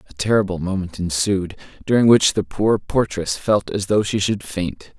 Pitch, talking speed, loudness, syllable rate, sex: 95 Hz, 180 wpm, -19 LUFS, 4.7 syllables/s, male